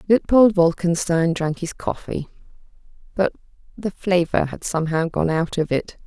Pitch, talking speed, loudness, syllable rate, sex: 175 Hz, 140 wpm, -21 LUFS, 4.7 syllables/s, female